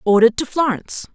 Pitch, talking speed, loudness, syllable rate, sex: 240 Hz, 155 wpm, -17 LUFS, 7.1 syllables/s, female